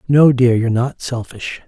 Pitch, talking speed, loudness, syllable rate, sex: 125 Hz, 180 wpm, -16 LUFS, 4.7 syllables/s, male